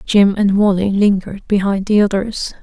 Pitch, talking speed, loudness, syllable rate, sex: 200 Hz, 160 wpm, -15 LUFS, 4.9 syllables/s, female